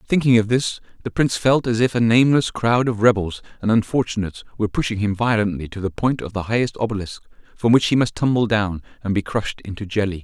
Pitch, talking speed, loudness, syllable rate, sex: 110 Hz, 215 wpm, -20 LUFS, 6.4 syllables/s, male